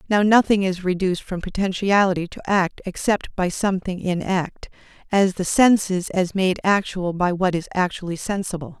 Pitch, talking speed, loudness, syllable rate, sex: 190 Hz, 165 wpm, -21 LUFS, 4.9 syllables/s, female